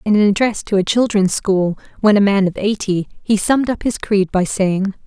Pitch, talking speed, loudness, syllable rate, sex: 200 Hz, 225 wpm, -16 LUFS, 5.0 syllables/s, female